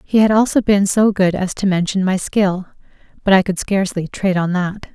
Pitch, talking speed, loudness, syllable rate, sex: 190 Hz, 220 wpm, -16 LUFS, 5.4 syllables/s, female